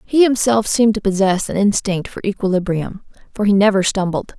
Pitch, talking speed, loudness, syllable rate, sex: 205 Hz, 180 wpm, -17 LUFS, 5.5 syllables/s, female